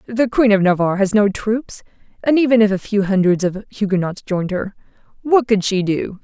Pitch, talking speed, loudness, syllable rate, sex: 205 Hz, 200 wpm, -17 LUFS, 5.4 syllables/s, female